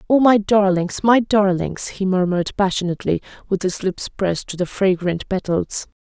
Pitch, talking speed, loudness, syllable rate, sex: 190 Hz, 160 wpm, -19 LUFS, 5.0 syllables/s, female